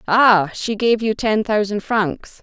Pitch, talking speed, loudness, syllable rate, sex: 210 Hz, 175 wpm, -18 LUFS, 3.6 syllables/s, female